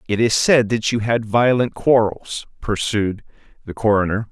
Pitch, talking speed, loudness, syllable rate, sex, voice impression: 110 Hz, 155 wpm, -18 LUFS, 4.5 syllables/s, male, very masculine, very middle-aged, very thick, very tensed, powerful, slightly dark, soft, very muffled, very fluent, slightly raspy, very cool, very intellectual, refreshing, sincere, very calm, mature, very friendly, very reassuring, very unique, elegant, very wild, sweet, lively, kind, slightly intense